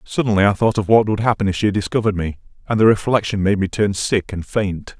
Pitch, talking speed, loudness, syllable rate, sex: 100 Hz, 240 wpm, -18 LUFS, 6.1 syllables/s, male